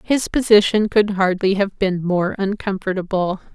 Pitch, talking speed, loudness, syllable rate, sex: 195 Hz, 135 wpm, -18 LUFS, 4.5 syllables/s, female